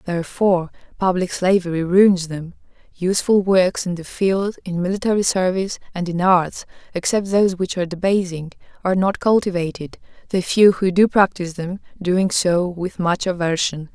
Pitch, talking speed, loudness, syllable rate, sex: 185 Hz, 150 wpm, -19 LUFS, 5.2 syllables/s, female